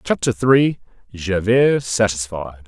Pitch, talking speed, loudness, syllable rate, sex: 105 Hz, 65 wpm, -18 LUFS, 3.7 syllables/s, male